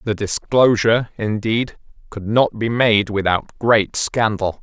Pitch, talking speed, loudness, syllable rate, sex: 110 Hz, 130 wpm, -18 LUFS, 3.9 syllables/s, male